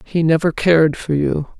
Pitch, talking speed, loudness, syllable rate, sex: 160 Hz, 190 wpm, -16 LUFS, 4.9 syllables/s, female